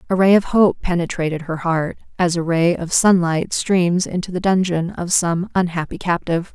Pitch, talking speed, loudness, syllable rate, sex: 175 Hz, 185 wpm, -18 LUFS, 4.9 syllables/s, female